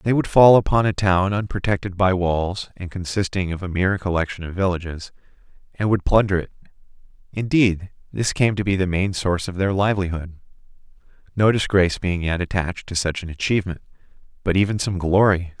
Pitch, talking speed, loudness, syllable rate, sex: 95 Hz, 175 wpm, -20 LUFS, 5.8 syllables/s, male